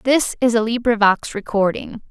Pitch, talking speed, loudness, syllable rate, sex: 225 Hz, 140 wpm, -18 LUFS, 4.8 syllables/s, female